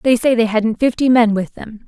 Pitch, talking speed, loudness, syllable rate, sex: 230 Hz, 255 wpm, -15 LUFS, 5.1 syllables/s, female